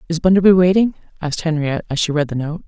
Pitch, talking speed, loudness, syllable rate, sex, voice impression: 165 Hz, 225 wpm, -17 LUFS, 7.3 syllables/s, female, slightly feminine, adult-like, slightly cool, intellectual, slightly calm, slightly sweet